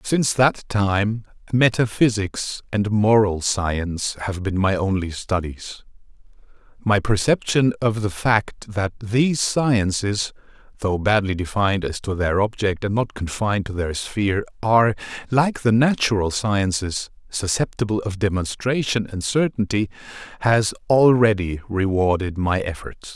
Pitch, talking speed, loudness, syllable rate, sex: 105 Hz, 125 wpm, -21 LUFS, 4.3 syllables/s, male